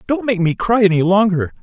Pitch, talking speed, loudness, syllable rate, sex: 190 Hz, 220 wpm, -15 LUFS, 5.6 syllables/s, male